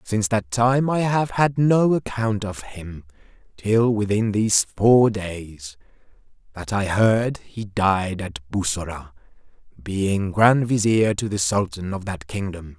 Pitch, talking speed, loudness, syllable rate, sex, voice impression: 105 Hz, 145 wpm, -21 LUFS, 3.7 syllables/s, male, very masculine, very middle-aged, very thick, slightly tensed, very powerful, dark, slightly soft, muffled, fluent, raspy, very cool, intellectual, sincere, very calm, very mature, friendly, reassuring, very unique, elegant, wild, sweet, lively, kind, slightly modest